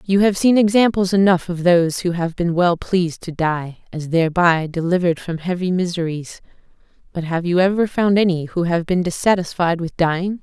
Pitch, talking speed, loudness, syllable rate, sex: 175 Hz, 185 wpm, -18 LUFS, 5.4 syllables/s, female